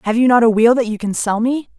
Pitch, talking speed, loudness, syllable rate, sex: 230 Hz, 335 wpm, -15 LUFS, 6.4 syllables/s, female